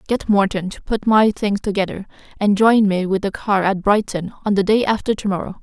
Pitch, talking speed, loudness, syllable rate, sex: 200 Hz, 225 wpm, -18 LUFS, 5.4 syllables/s, female